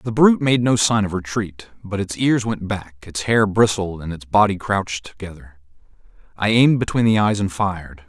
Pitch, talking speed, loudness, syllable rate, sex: 100 Hz, 200 wpm, -19 LUFS, 5.2 syllables/s, male